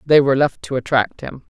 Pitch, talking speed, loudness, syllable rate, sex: 140 Hz, 230 wpm, -18 LUFS, 5.9 syllables/s, female